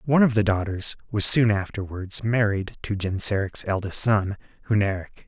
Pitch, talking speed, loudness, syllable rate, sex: 105 Hz, 150 wpm, -23 LUFS, 5.2 syllables/s, male